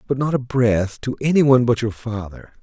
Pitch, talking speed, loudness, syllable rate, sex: 125 Hz, 205 wpm, -19 LUFS, 5.2 syllables/s, male